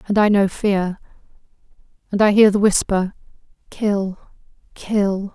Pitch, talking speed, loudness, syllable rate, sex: 200 Hz, 125 wpm, -18 LUFS, 3.9 syllables/s, female